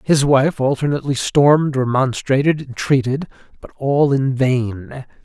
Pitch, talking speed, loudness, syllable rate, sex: 135 Hz, 115 wpm, -17 LUFS, 4.4 syllables/s, male